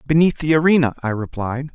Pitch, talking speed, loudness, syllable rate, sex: 140 Hz, 170 wpm, -18 LUFS, 6.2 syllables/s, male